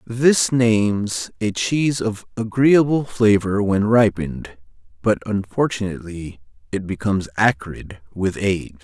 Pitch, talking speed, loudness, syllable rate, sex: 105 Hz, 110 wpm, -19 LUFS, 4.2 syllables/s, male